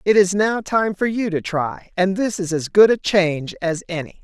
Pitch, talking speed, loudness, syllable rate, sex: 190 Hz, 240 wpm, -19 LUFS, 4.9 syllables/s, female